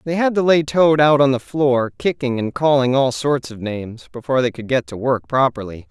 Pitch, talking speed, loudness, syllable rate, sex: 130 Hz, 235 wpm, -18 LUFS, 5.3 syllables/s, male